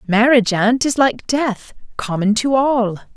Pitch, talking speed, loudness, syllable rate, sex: 235 Hz, 150 wpm, -16 LUFS, 4.2 syllables/s, female